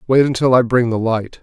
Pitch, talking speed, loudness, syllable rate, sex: 120 Hz, 250 wpm, -15 LUFS, 5.5 syllables/s, male